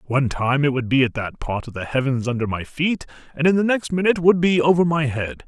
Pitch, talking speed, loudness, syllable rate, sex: 145 Hz, 265 wpm, -20 LUFS, 5.9 syllables/s, male